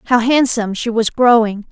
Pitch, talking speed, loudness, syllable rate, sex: 235 Hz, 175 wpm, -14 LUFS, 5.3 syllables/s, female